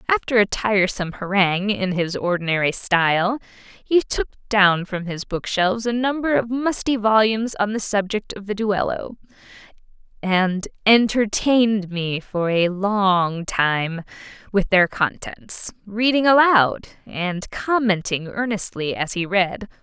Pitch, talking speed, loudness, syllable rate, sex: 200 Hz, 135 wpm, -20 LUFS, 4.2 syllables/s, female